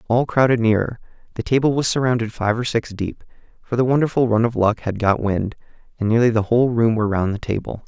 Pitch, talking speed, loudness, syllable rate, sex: 115 Hz, 220 wpm, -19 LUFS, 6.1 syllables/s, male